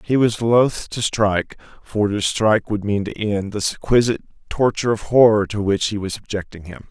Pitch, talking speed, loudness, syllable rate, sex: 105 Hz, 200 wpm, -19 LUFS, 5.3 syllables/s, male